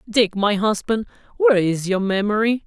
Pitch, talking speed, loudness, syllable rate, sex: 200 Hz, 155 wpm, -19 LUFS, 5.0 syllables/s, male